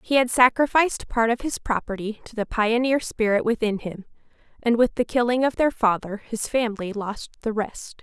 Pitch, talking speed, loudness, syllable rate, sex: 230 Hz, 185 wpm, -23 LUFS, 5.2 syllables/s, female